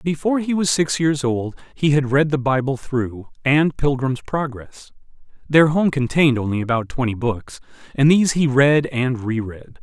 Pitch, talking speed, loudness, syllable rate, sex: 135 Hz, 175 wpm, -19 LUFS, 4.7 syllables/s, male